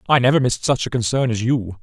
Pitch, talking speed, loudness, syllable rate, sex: 125 Hz, 265 wpm, -19 LUFS, 6.7 syllables/s, male